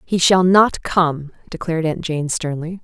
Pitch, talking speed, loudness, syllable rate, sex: 170 Hz, 170 wpm, -17 LUFS, 4.3 syllables/s, female